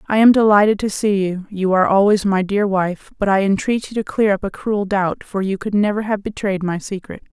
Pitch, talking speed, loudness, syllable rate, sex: 200 Hz, 245 wpm, -18 LUFS, 5.4 syllables/s, female